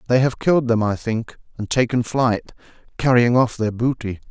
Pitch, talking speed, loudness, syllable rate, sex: 120 Hz, 180 wpm, -20 LUFS, 5.0 syllables/s, male